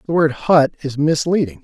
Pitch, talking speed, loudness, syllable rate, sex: 145 Hz, 185 wpm, -17 LUFS, 5.2 syllables/s, male